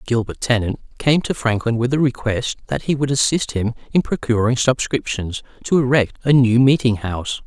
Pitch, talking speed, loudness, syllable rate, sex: 125 Hz, 175 wpm, -19 LUFS, 5.2 syllables/s, male